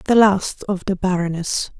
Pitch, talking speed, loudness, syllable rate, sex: 190 Hz, 170 wpm, -19 LUFS, 4.5 syllables/s, female